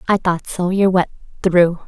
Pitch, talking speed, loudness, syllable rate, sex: 180 Hz, 190 wpm, -17 LUFS, 5.3 syllables/s, female